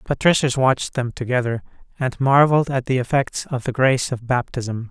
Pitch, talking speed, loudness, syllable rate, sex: 130 Hz, 170 wpm, -20 LUFS, 5.5 syllables/s, male